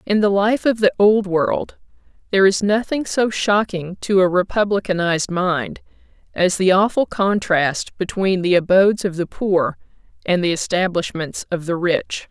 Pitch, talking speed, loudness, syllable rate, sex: 190 Hz, 155 wpm, -18 LUFS, 4.6 syllables/s, female